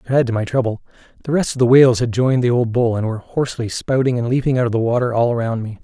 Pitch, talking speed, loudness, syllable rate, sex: 120 Hz, 290 wpm, -17 LUFS, 7.3 syllables/s, male